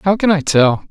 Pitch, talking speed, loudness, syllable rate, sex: 165 Hz, 265 wpm, -14 LUFS, 4.9 syllables/s, male